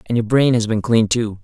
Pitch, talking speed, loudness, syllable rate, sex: 115 Hz, 295 wpm, -17 LUFS, 6.2 syllables/s, male